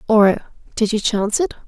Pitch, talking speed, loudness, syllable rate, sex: 225 Hz, 145 wpm, -18 LUFS, 6.1 syllables/s, female